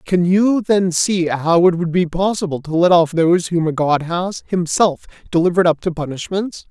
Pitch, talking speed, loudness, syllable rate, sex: 175 Hz, 195 wpm, -17 LUFS, 4.9 syllables/s, male